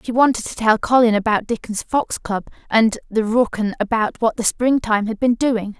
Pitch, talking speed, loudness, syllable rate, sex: 225 Hz, 205 wpm, -19 LUFS, 5.0 syllables/s, female